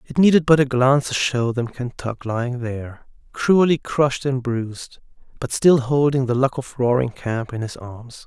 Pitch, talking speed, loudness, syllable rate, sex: 130 Hz, 190 wpm, -20 LUFS, 4.8 syllables/s, male